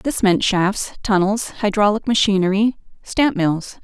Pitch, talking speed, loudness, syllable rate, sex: 205 Hz, 125 wpm, -18 LUFS, 4.0 syllables/s, female